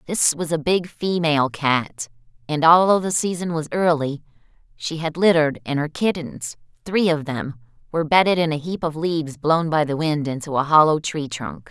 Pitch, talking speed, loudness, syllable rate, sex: 155 Hz, 190 wpm, -20 LUFS, 5.0 syllables/s, female